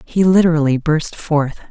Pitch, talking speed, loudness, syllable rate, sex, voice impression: 160 Hz, 140 wpm, -15 LUFS, 4.7 syllables/s, female, feminine, adult-like, tensed, bright, soft, fluent, calm, friendly, reassuring, elegant, lively, kind